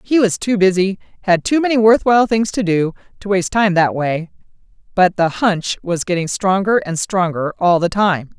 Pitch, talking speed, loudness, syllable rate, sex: 190 Hz, 195 wpm, -16 LUFS, 5.0 syllables/s, female